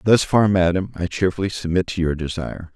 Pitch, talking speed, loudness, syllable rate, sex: 90 Hz, 195 wpm, -20 LUFS, 5.8 syllables/s, male